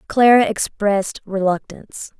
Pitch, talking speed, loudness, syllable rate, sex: 210 Hz, 80 wpm, -17 LUFS, 4.6 syllables/s, female